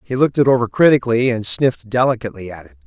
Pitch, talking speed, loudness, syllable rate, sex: 120 Hz, 210 wpm, -16 LUFS, 7.4 syllables/s, male